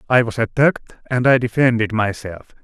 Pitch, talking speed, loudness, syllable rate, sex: 115 Hz, 160 wpm, -17 LUFS, 5.8 syllables/s, male